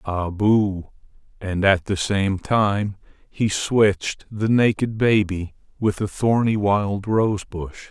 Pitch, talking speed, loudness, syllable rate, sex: 100 Hz, 130 wpm, -21 LUFS, 3.3 syllables/s, male